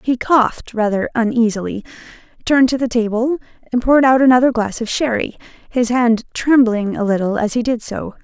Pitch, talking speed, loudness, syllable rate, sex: 240 Hz, 170 wpm, -16 LUFS, 5.5 syllables/s, female